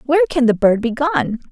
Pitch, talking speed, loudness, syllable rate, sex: 240 Hz, 240 wpm, -16 LUFS, 5.5 syllables/s, female